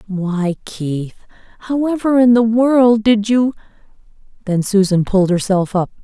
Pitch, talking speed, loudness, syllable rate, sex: 210 Hz, 130 wpm, -15 LUFS, 4.3 syllables/s, female